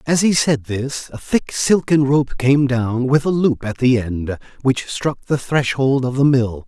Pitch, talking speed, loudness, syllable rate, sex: 130 Hz, 205 wpm, -18 LUFS, 4.0 syllables/s, male